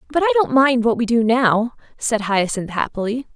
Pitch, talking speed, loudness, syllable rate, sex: 240 Hz, 195 wpm, -18 LUFS, 4.8 syllables/s, female